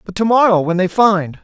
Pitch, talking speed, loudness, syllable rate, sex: 195 Hz, 210 wpm, -14 LUFS, 5.3 syllables/s, male